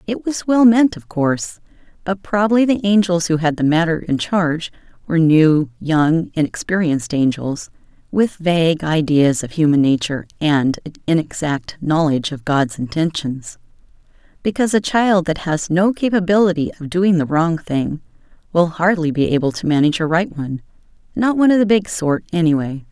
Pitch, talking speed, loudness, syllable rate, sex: 165 Hz, 160 wpm, -17 LUFS, 5.1 syllables/s, female